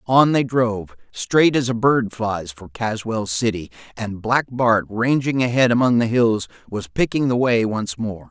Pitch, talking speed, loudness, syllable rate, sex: 115 Hz, 180 wpm, -19 LUFS, 4.3 syllables/s, male